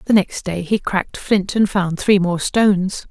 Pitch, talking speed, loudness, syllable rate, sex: 190 Hz, 210 wpm, -18 LUFS, 4.4 syllables/s, female